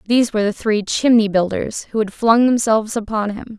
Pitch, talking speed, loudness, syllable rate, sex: 220 Hz, 200 wpm, -17 LUFS, 5.8 syllables/s, female